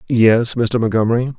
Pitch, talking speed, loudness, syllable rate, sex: 115 Hz, 130 wpm, -16 LUFS, 5.1 syllables/s, male